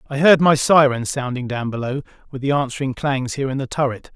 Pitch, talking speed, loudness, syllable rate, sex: 135 Hz, 215 wpm, -19 LUFS, 5.9 syllables/s, male